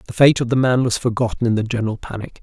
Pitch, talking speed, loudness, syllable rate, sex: 120 Hz, 270 wpm, -18 LUFS, 6.7 syllables/s, male